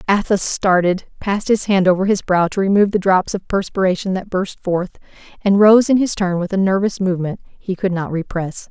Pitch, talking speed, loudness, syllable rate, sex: 190 Hz, 205 wpm, -17 LUFS, 5.4 syllables/s, female